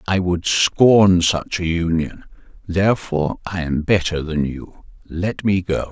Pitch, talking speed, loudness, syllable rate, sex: 90 Hz, 140 wpm, -18 LUFS, 3.9 syllables/s, male